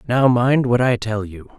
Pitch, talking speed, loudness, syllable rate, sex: 120 Hz, 225 wpm, -18 LUFS, 4.4 syllables/s, male